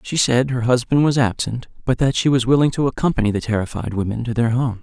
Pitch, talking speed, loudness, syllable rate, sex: 125 Hz, 235 wpm, -19 LUFS, 6.1 syllables/s, male